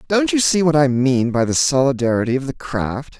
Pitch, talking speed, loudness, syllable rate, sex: 140 Hz, 225 wpm, -17 LUFS, 5.3 syllables/s, male